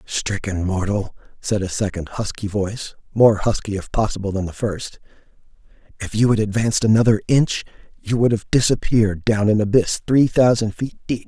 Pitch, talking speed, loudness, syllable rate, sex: 105 Hz, 165 wpm, -19 LUFS, 5.2 syllables/s, male